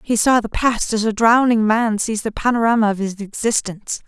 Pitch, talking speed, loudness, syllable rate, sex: 220 Hz, 205 wpm, -18 LUFS, 5.4 syllables/s, female